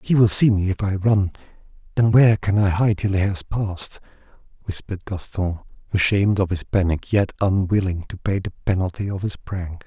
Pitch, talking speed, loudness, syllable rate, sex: 95 Hz, 190 wpm, -21 LUFS, 5.3 syllables/s, male